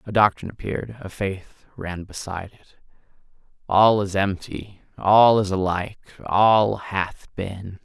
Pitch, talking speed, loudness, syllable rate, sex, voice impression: 100 Hz, 130 wpm, -21 LUFS, 4.3 syllables/s, male, very masculine, very adult-like, slightly middle-aged, very relaxed, very weak, very dark, slightly soft, muffled, slightly halting, very raspy, cool, slightly intellectual, sincere, very calm, very mature, slightly friendly, reassuring, very unique, slightly elegant, wild, kind, modest